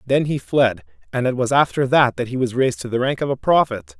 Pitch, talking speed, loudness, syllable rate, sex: 130 Hz, 270 wpm, -19 LUFS, 5.9 syllables/s, male